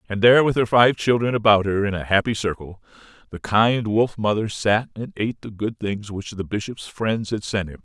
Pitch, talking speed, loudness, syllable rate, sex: 105 Hz, 220 wpm, -21 LUFS, 5.3 syllables/s, male